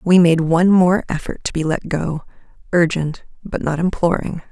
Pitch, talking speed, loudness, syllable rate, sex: 170 Hz, 175 wpm, -18 LUFS, 4.9 syllables/s, female